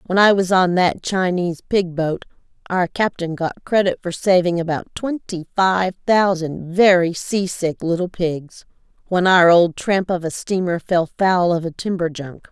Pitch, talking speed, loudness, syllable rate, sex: 180 Hz, 170 wpm, -18 LUFS, 4.4 syllables/s, female